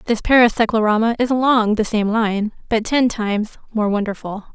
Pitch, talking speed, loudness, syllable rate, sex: 220 Hz, 170 wpm, -18 LUFS, 5.4 syllables/s, female